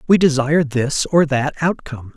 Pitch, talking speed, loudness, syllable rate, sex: 145 Hz, 165 wpm, -17 LUFS, 5.2 syllables/s, male